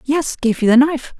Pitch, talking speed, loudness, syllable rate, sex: 265 Hz, 250 wpm, -15 LUFS, 5.8 syllables/s, female